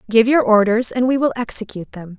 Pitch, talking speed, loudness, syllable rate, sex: 225 Hz, 220 wpm, -16 LUFS, 6.2 syllables/s, female